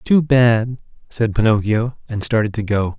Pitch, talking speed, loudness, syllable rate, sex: 115 Hz, 160 wpm, -17 LUFS, 4.5 syllables/s, male